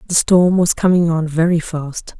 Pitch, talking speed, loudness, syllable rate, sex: 165 Hz, 190 wpm, -15 LUFS, 4.5 syllables/s, female